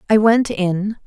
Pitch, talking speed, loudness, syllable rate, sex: 205 Hz, 170 wpm, -17 LUFS, 3.7 syllables/s, female